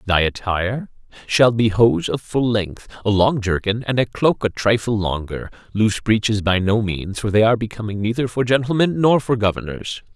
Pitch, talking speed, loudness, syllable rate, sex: 110 Hz, 190 wpm, -19 LUFS, 5.1 syllables/s, male